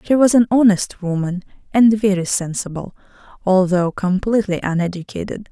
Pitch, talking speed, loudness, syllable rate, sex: 195 Hz, 120 wpm, -17 LUFS, 5.3 syllables/s, female